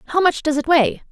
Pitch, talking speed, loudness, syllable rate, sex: 315 Hz, 270 wpm, -17 LUFS, 5.0 syllables/s, female